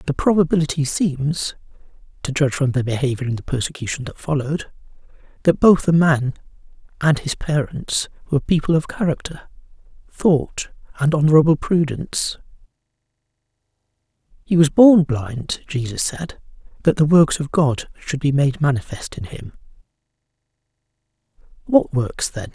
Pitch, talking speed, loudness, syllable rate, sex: 150 Hz, 130 wpm, -19 LUFS, 5.0 syllables/s, male